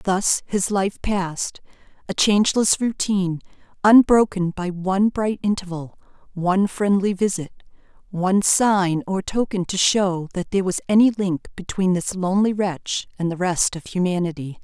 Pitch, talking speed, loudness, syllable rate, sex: 190 Hz, 140 wpm, -20 LUFS, 4.7 syllables/s, female